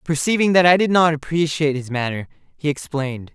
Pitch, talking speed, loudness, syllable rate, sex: 150 Hz, 180 wpm, -19 LUFS, 6.0 syllables/s, male